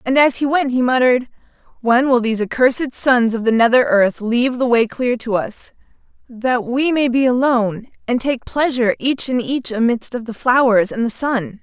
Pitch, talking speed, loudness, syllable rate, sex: 245 Hz, 200 wpm, -17 LUFS, 5.1 syllables/s, female